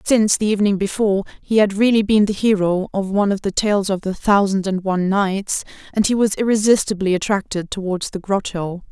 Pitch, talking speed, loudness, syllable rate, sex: 200 Hz, 195 wpm, -18 LUFS, 5.7 syllables/s, female